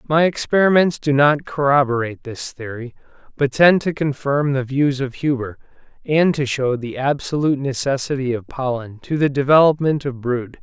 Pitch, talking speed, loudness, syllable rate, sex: 135 Hz, 160 wpm, -19 LUFS, 5.0 syllables/s, male